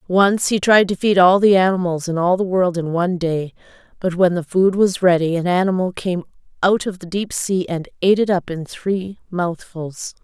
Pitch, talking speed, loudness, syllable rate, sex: 180 Hz, 210 wpm, -18 LUFS, 4.9 syllables/s, female